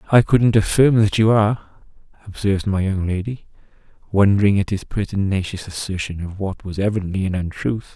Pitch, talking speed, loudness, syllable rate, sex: 100 Hz, 160 wpm, -19 LUFS, 5.5 syllables/s, male